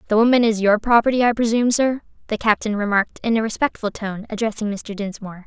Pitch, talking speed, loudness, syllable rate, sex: 220 Hz, 200 wpm, -19 LUFS, 6.5 syllables/s, female